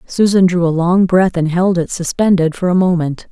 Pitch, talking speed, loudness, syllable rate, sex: 175 Hz, 215 wpm, -14 LUFS, 5.0 syllables/s, female